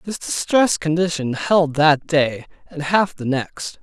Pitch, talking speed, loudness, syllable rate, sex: 160 Hz, 155 wpm, -19 LUFS, 4.1 syllables/s, male